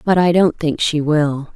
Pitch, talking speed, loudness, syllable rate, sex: 160 Hz, 230 wpm, -16 LUFS, 4.2 syllables/s, female